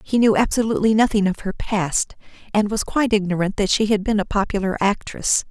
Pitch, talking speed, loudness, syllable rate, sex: 205 Hz, 195 wpm, -20 LUFS, 5.8 syllables/s, female